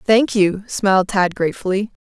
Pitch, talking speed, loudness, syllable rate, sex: 200 Hz, 150 wpm, -17 LUFS, 5.1 syllables/s, female